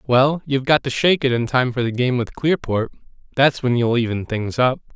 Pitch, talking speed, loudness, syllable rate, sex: 125 Hz, 230 wpm, -19 LUFS, 5.4 syllables/s, male